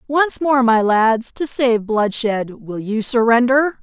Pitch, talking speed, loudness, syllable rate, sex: 240 Hz, 155 wpm, -17 LUFS, 3.5 syllables/s, female